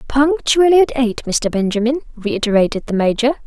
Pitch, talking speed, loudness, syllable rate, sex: 250 Hz, 140 wpm, -16 LUFS, 5.5 syllables/s, female